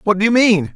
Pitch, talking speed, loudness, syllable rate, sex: 210 Hz, 320 wpm, -14 LUFS, 6.2 syllables/s, male